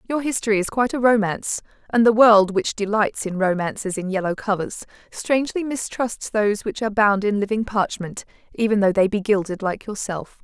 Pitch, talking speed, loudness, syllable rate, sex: 210 Hz, 185 wpm, -21 LUFS, 5.5 syllables/s, female